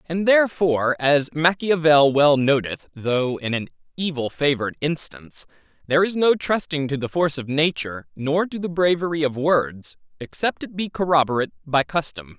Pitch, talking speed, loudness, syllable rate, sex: 150 Hz, 160 wpm, -21 LUFS, 4.9 syllables/s, male